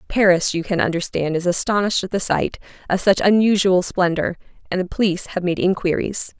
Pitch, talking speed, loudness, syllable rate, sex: 185 Hz, 180 wpm, -19 LUFS, 5.8 syllables/s, female